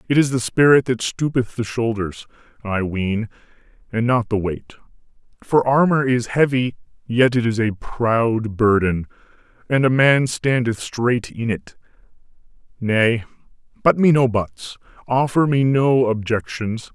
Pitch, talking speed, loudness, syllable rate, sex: 120 Hz, 140 wpm, -19 LUFS, 4.1 syllables/s, male